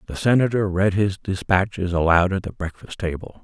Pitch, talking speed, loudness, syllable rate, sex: 95 Hz, 175 wpm, -21 LUFS, 5.2 syllables/s, male